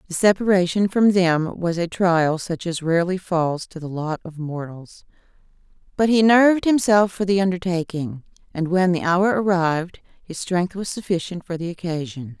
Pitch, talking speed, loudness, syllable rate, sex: 175 Hz, 170 wpm, -20 LUFS, 4.8 syllables/s, female